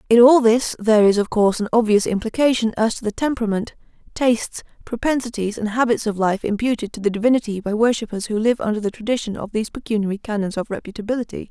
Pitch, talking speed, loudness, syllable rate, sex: 220 Hz, 195 wpm, -20 LUFS, 6.7 syllables/s, female